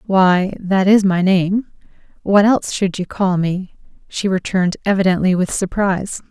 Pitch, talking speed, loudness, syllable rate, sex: 190 Hz, 145 wpm, -16 LUFS, 4.7 syllables/s, female